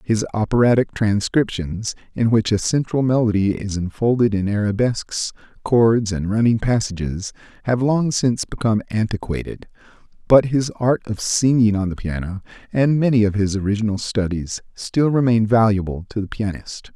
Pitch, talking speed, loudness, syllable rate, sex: 110 Hz, 145 wpm, -19 LUFS, 5.0 syllables/s, male